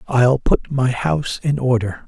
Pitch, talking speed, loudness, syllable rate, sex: 130 Hz, 175 wpm, -18 LUFS, 4.3 syllables/s, male